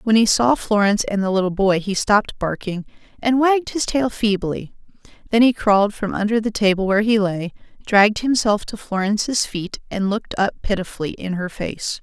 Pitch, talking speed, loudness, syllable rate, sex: 210 Hz, 190 wpm, -19 LUFS, 5.4 syllables/s, female